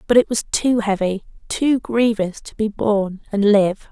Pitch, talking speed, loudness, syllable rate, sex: 210 Hz, 185 wpm, -19 LUFS, 4.5 syllables/s, female